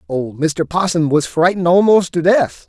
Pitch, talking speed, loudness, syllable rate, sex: 165 Hz, 180 wpm, -15 LUFS, 4.8 syllables/s, male